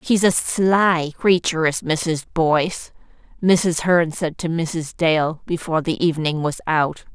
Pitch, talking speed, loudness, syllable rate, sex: 165 Hz, 150 wpm, -19 LUFS, 4.0 syllables/s, female